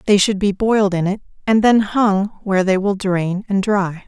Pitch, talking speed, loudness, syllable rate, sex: 200 Hz, 220 wpm, -17 LUFS, 4.8 syllables/s, female